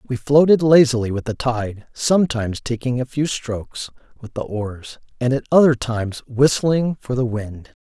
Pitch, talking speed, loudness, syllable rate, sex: 125 Hz, 170 wpm, -19 LUFS, 4.8 syllables/s, male